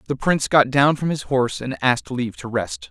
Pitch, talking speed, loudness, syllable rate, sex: 135 Hz, 250 wpm, -20 LUFS, 6.0 syllables/s, male